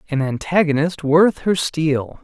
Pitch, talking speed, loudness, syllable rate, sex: 155 Hz, 135 wpm, -18 LUFS, 3.9 syllables/s, male